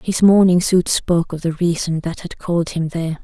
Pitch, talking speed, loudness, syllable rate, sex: 170 Hz, 225 wpm, -17 LUFS, 5.3 syllables/s, female